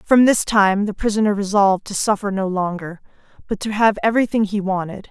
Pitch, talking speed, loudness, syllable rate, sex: 200 Hz, 190 wpm, -18 LUFS, 5.7 syllables/s, female